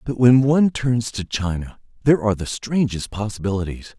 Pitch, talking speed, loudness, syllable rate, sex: 115 Hz, 165 wpm, -20 LUFS, 5.5 syllables/s, male